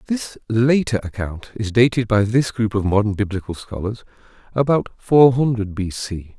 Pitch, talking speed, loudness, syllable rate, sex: 110 Hz, 160 wpm, -19 LUFS, 4.7 syllables/s, male